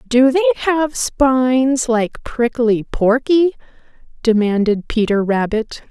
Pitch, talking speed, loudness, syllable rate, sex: 245 Hz, 100 wpm, -16 LUFS, 3.7 syllables/s, female